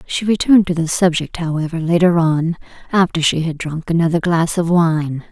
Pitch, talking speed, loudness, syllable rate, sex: 170 Hz, 180 wpm, -16 LUFS, 5.2 syllables/s, female